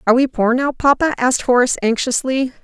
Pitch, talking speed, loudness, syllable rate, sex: 255 Hz, 180 wpm, -16 LUFS, 6.4 syllables/s, female